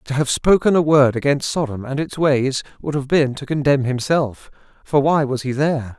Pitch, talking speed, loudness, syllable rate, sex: 140 Hz, 200 wpm, -18 LUFS, 5.1 syllables/s, male